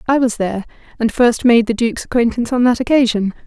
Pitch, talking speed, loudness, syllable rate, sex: 235 Hz, 210 wpm, -15 LUFS, 6.6 syllables/s, female